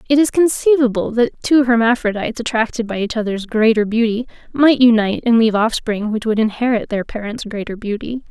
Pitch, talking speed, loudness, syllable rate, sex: 230 Hz, 175 wpm, -16 LUFS, 5.8 syllables/s, female